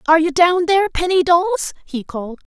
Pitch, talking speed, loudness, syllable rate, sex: 330 Hz, 190 wpm, -16 LUFS, 5.6 syllables/s, female